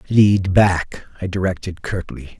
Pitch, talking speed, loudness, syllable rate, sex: 95 Hz, 125 wpm, -19 LUFS, 3.9 syllables/s, male